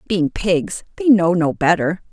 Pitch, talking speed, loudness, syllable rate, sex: 185 Hz, 170 wpm, -17 LUFS, 4.0 syllables/s, female